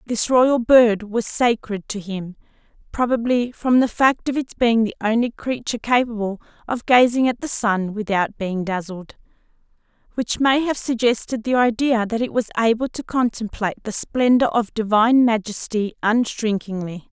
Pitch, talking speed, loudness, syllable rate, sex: 225 Hz, 155 wpm, -20 LUFS, 4.8 syllables/s, female